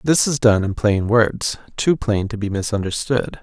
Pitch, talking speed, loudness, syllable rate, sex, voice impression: 110 Hz, 175 wpm, -19 LUFS, 4.4 syllables/s, male, masculine, adult-like, slightly relaxed, weak, slightly fluent, cool, calm, reassuring, sweet